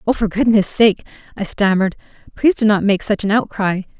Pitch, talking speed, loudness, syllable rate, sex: 205 Hz, 195 wpm, -16 LUFS, 5.9 syllables/s, female